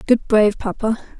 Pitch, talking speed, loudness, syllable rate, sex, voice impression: 220 Hz, 150 wpm, -18 LUFS, 5.8 syllables/s, female, feminine, adult-like, relaxed, weak, fluent, raspy, intellectual, calm, elegant, slightly kind, modest